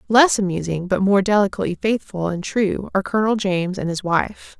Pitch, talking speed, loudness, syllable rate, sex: 195 Hz, 185 wpm, -20 LUFS, 5.8 syllables/s, female